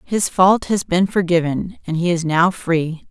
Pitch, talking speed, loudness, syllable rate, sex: 175 Hz, 195 wpm, -18 LUFS, 4.1 syllables/s, female